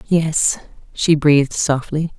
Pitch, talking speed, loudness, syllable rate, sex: 155 Hz, 110 wpm, -17 LUFS, 3.6 syllables/s, female